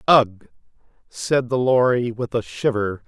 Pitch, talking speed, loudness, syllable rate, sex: 115 Hz, 135 wpm, -20 LUFS, 3.9 syllables/s, male